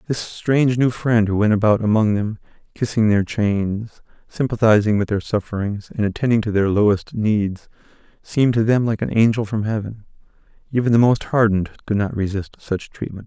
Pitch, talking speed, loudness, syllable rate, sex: 110 Hz, 175 wpm, -19 LUFS, 5.3 syllables/s, male